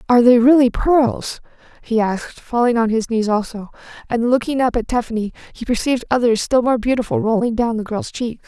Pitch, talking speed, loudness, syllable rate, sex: 235 Hz, 190 wpm, -17 LUFS, 5.6 syllables/s, female